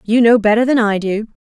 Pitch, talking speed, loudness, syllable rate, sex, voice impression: 220 Hz, 250 wpm, -14 LUFS, 5.8 syllables/s, female, feminine, adult-like, tensed, powerful, clear, fluent, intellectual, friendly, lively, intense